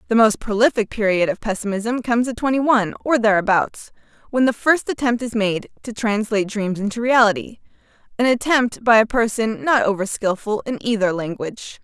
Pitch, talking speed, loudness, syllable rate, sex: 220 Hz, 170 wpm, -19 LUFS, 5.4 syllables/s, female